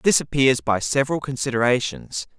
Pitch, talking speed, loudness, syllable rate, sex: 125 Hz, 125 wpm, -21 LUFS, 5.3 syllables/s, male